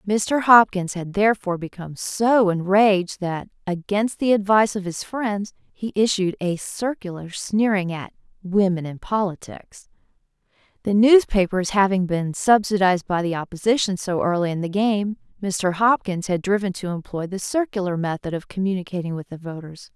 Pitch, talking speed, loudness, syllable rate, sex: 195 Hz, 150 wpm, -21 LUFS, 5.0 syllables/s, female